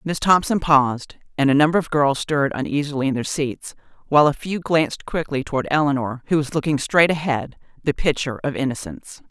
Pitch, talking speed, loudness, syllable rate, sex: 145 Hz, 185 wpm, -20 LUFS, 6.0 syllables/s, female